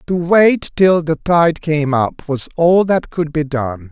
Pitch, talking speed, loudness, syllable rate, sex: 160 Hz, 200 wpm, -15 LUFS, 3.6 syllables/s, male